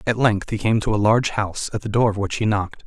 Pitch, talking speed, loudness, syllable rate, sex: 105 Hz, 315 wpm, -21 LUFS, 6.6 syllables/s, male